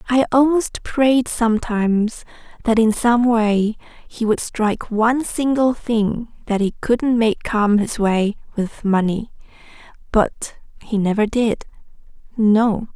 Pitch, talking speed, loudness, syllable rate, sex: 225 Hz, 130 wpm, -18 LUFS, 3.8 syllables/s, female